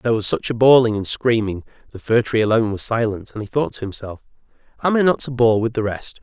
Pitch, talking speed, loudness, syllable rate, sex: 115 Hz, 240 wpm, -19 LUFS, 6.3 syllables/s, male